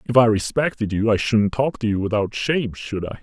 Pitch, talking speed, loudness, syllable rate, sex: 110 Hz, 240 wpm, -21 LUFS, 5.5 syllables/s, male